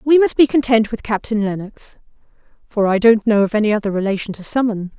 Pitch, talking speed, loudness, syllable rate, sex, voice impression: 220 Hz, 205 wpm, -17 LUFS, 5.9 syllables/s, female, very feminine, very adult-like, middle-aged, slightly thin, tensed, slightly powerful, bright, hard, clear, fluent, cool, intellectual, very refreshing, sincere, calm, friendly, reassuring, slightly unique, slightly elegant, wild, very lively, slightly strict, slightly intense, sharp